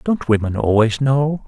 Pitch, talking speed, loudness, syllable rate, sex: 125 Hz, 165 wpm, -17 LUFS, 4.4 syllables/s, male